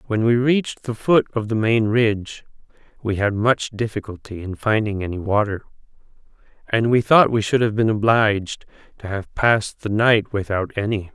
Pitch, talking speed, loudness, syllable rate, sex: 110 Hz, 170 wpm, -20 LUFS, 5.0 syllables/s, male